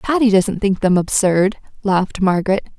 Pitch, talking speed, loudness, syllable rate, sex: 200 Hz, 150 wpm, -17 LUFS, 4.9 syllables/s, female